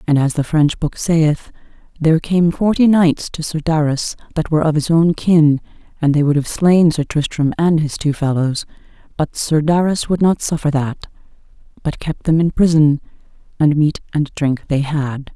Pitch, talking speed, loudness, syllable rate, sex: 155 Hz, 190 wpm, -16 LUFS, 4.7 syllables/s, female